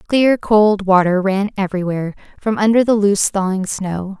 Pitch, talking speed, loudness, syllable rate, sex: 200 Hz, 155 wpm, -16 LUFS, 5.1 syllables/s, female